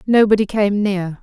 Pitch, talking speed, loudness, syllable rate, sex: 205 Hz, 145 wpm, -16 LUFS, 4.6 syllables/s, female